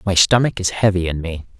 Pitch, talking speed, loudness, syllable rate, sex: 95 Hz, 225 wpm, -17 LUFS, 5.8 syllables/s, male